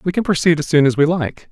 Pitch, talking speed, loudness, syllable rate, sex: 160 Hz, 315 wpm, -16 LUFS, 6.4 syllables/s, male